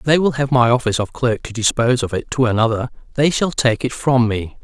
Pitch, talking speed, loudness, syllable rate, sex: 125 Hz, 260 wpm, -18 LUFS, 6.1 syllables/s, male